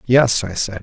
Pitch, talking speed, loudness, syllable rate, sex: 110 Hz, 220 wpm, -17 LUFS, 4.2 syllables/s, male